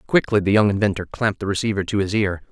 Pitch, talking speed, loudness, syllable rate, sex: 100 Hz, 240 wpm, -20 LUFS, 7.0 syllables/s, male